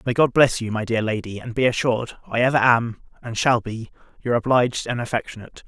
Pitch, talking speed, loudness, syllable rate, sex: 120 Hz, 210 wpm, -21 LUFS, 6.1 syllables/s, male